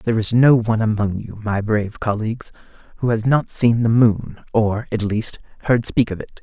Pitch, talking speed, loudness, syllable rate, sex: 110 Hz, 205 wpm, -19 LUFS, 5.1 syllables/s, male